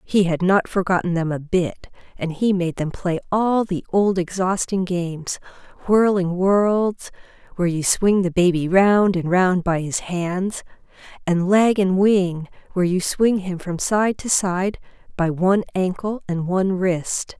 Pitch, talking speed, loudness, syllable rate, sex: 185 Hz, 165 wpm, -20 LUFS, 4.1 syllables/s, female